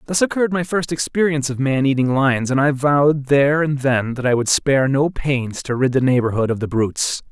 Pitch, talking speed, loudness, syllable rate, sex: 140 Hz, 230 wpm, -18 LUFS, 5.7 syllables/s, male